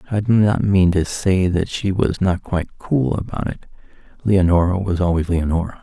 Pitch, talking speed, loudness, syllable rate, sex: 95 Hz, 185 wpm, -19 LUFS, 5.0 syllables/s, male